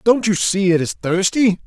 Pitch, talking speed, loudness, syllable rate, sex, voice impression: 200 Hz, 215 wpm, -17 LUFS, 4.6 syllables/s, male, masculine, adult-like, tensed, slightly weak, soft, cool, calm, reassuring, slightly wild, kind, modest